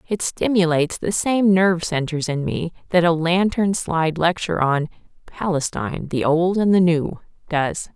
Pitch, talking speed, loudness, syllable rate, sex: 170 Hz, 150 wpm, -20 LUFS, 4.8 syllables/s, female